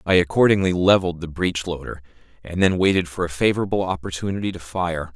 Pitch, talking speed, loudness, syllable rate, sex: 90 Hz, 175 wpm, -21 LUFS, 6.3 syllables/s, male